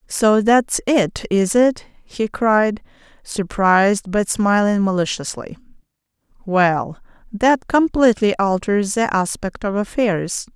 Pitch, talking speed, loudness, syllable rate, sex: 210 Hz, 110 wpm, -18 LUFS, 3.6 syllables/s, female